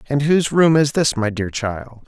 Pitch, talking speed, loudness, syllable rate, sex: 135 Hz, 230 wpm, -17 LUFS, 4.7 syllables/s, male